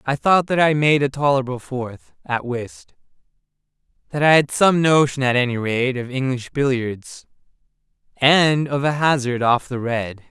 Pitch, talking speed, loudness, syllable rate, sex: 130 Hz, 165 wpm, -19 LUFS, 4.5 syllables/s, male